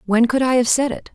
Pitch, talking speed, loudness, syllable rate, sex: 245 Hz, 315 wpm, -17 LUFS, 6.1 syllables/s, female